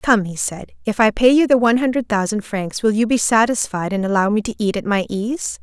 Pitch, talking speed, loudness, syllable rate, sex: 220 Hz, 255 wpm, -18 LUFS, 5.6 syllables/s, female